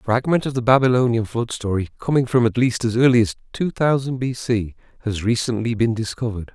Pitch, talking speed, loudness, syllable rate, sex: 120 Hz, 200 wpm, -20 LUFS, 5.9 syllables/s, male